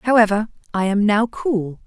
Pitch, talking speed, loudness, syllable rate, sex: 210 Hz, 160 wpm, -19 LUFS, 4.4 syllables/s, female